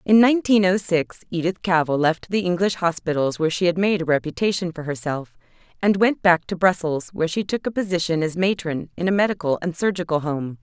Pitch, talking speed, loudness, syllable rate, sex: 175 Hz, 205 wpm, -21 LUFS, 5.8 syllables/s, female